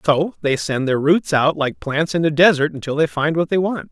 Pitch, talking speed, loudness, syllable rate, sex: 150 Hz, 260 wpm, -18 LUFS, 5.1 syllables/s, male